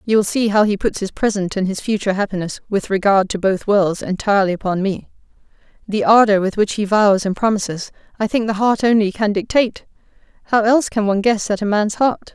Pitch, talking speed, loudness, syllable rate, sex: 205 Hz, 215 wpm, -17 LUFS, 5.9 syllables/s, female